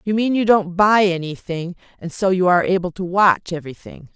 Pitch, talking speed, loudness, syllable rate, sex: 185 Hz, 200 wpm, -18 LUFS, 5.6 syllables/s, female